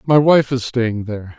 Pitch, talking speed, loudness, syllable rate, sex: 125 Hz, 215 wpm, -16 LUFS, 4.8 syllables/s, male